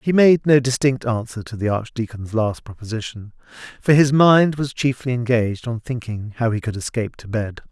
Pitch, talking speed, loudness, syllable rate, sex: 120 Hz, 185 wpm, -20 LUFS, 5.3 syllables/s, male